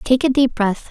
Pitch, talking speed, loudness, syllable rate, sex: 245 Hz, 265 wpm, -17 LUFS, 4.7 syllables/s, female